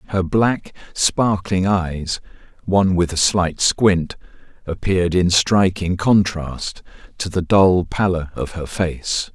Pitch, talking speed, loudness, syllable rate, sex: 90 Hz, 130 wpm, -18 LUFS, 3.6 syllables/s, male